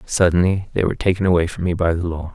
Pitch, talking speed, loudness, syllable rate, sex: 90 Hz, 255 wpm, -19 LUFS, 6.9 syllables/s, male